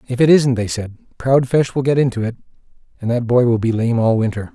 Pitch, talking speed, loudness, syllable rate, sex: 125 Hz, 250 wpm, -17 LUFS, 5.9 syllables/s, male